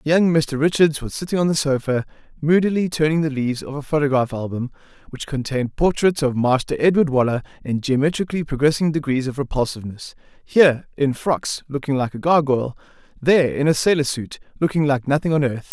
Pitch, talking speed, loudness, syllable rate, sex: 145 Hz, 170 wpm, -20 LUFS, 5.9 syllables/s, male